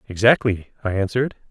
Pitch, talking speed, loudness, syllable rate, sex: 110 Hz, 120 wpm, -20 LUFS, 6.3 syllables/s, male